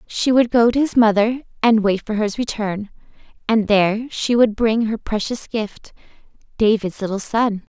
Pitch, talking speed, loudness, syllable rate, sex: 220 Hz, 165 wpm, -18 LUFS, 4.6 syllables/s, female